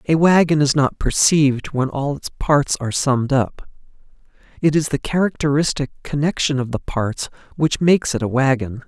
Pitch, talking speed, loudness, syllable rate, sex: 140 Hz, 170 wpm, -18 LUFS, 5.1 syllables/s, male